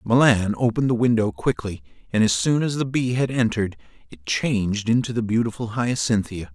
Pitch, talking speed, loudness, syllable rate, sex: 115 Hz, 175 wpm, -22 LUFS, 5.5 syllables/s, male